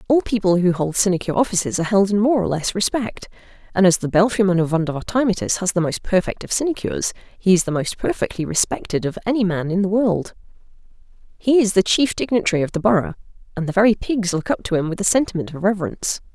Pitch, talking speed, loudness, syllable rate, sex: 195 Hz, 215 wpm, -19 LUFS, 6.6 syllables/s, female